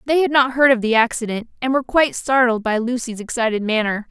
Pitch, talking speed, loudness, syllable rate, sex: 240 Hz, 220 wpm, -18 LUFS, 6.3 syllables/s, female